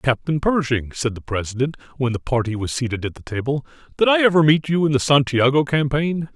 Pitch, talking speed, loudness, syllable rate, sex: 135 Hz, 210 wpm, -20 LUFS, 5.7 syllables/s, male